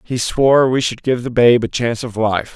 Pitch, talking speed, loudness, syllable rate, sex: 120 Hz, 260 wpm, -16 LUFS, 5.3 syllables/s, male